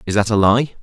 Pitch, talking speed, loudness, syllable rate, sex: 110 Hz, 290 wpm, -16 LUFS, 6.3 syllables/s, male